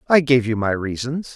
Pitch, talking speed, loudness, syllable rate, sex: 125 Hz, 220 wpm, -20 LUFS, 5.0 syllables/s, male